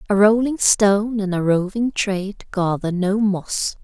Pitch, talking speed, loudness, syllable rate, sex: 200 Hz, 155 wpm, -19 LUFS, 4.3 syllables/s, female